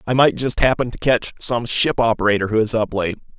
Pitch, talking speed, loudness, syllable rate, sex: 115 Hz, 230 wpm, -18 LUFS, 5.8 syllables/s, male